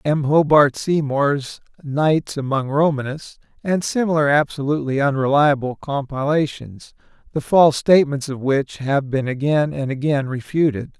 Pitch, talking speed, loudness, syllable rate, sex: 145 Hz, 120 wpm, -19 LUFS, 4.6 syllables/s, male